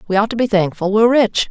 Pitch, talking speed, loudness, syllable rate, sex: 210 Hz, 280 wpm, -15 LUFS, 6.8 syllables/s, female